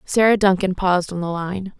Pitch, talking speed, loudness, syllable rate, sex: 185 Hz, 200 wpm, -19 LUFS, 5.4 syllables/s, female